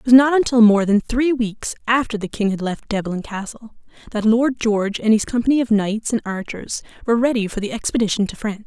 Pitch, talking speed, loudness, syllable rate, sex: 225 Hz, 220 wpm, -19 LUFS, 5.8 syllables/s, female